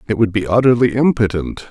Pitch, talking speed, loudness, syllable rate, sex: 110 Hz, 175 wpm, -15 LUFS, 5.8 syllables/s, male